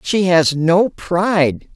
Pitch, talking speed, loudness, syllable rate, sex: 175 Hz, 135 wpm, -15 LUFS, 3.1 syllables/s, female